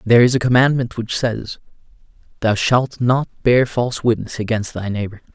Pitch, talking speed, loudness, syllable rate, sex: 120 Hz, 170 wpm, -18 LUFS, 5.1 syllables/s, male